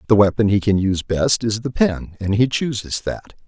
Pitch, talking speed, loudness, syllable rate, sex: 105 Hz, 225 wpm, -19 LUFS, 5.1 syllables/s, male